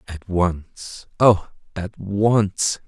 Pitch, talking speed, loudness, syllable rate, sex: 95 Hz, 85 wpm, -20 LUFS, 2.2 syllables/s, male